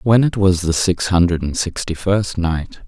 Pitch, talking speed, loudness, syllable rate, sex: 90 Hz, 210 wpm, -18 LUFS, 4.3 syllables/s, male